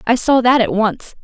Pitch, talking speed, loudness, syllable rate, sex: 235 Hz, 245 wpm, -14 LUFS, 4.8 syllables/s, female